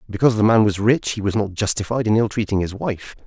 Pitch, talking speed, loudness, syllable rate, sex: 105 Hz, 255 wpm, -19 LUFS, 6.3 syllables/s, male